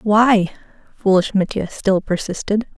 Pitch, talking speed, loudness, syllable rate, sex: 200 Hz, 110 wpm, -18 LUFS, 4.1 syllables/s, female